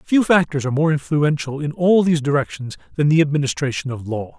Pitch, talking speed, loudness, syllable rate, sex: 150 Hz, 190 wpm, -19 LUFS, 6.1 syllables/s, male